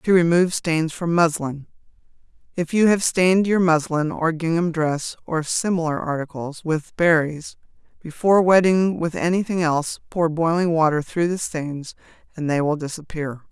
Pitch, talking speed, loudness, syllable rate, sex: 165 Hz, 145 wpm, -21 LUFS, 4.8 syllables/s, female